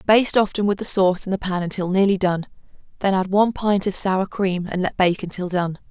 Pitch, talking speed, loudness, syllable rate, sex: 190 Hz, 235 wpm, -21 LUFS, 5.8 syllables/s, female